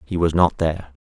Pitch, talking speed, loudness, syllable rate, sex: 80 Hz, 235 wpm, -20 LUFS, 6.0 syllables/s, male